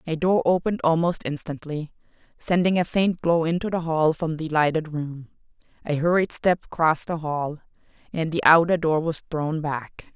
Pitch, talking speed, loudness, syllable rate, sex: 160 Hz, 165 wpm, -23 LUFS, 4.8 syllables/s, female